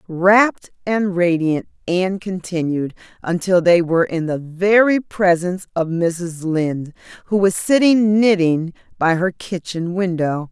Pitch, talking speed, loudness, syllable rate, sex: 180 Hz, 130 wpm, -18 LUFS, 4.1 syllables/s, female